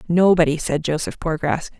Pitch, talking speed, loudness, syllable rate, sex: 160 Hz, 135 wpm, -20 LUFS, 5.2 syllables/s, female